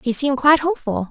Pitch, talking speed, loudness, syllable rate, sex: 270 Hz, 220 wpm, -17 LUFS, 7.9 syllables/s, female